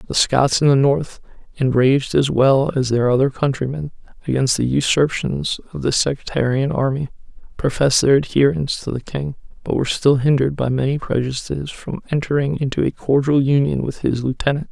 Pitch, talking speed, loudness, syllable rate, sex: 135 Hz, 165 wpm, -18 LUFS, 5.6 syllables/s, male